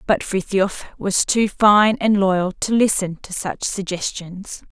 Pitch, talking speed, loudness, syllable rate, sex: 195 Hz, 155 wpm, -19 LUFS, 3.7 syllables/s, female